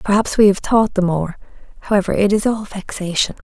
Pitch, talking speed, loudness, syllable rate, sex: 200 Hz, 190 wpm, -17 LUFS, 5.8 syllables/s, female